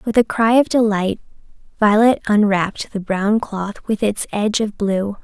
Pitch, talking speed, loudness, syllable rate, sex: 210 Hz, 170 wpm, -18 LUFS, 4.6 syllables/s, female